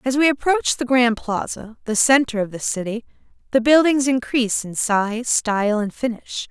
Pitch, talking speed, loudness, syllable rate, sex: 240 Hz, 175 wpm, -19 LUFS, 4.8 syllables/s, female